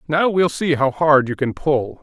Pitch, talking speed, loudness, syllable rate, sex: 150 Hz, 235 wpm, -18 LUFS, 4.3 syllables/s, male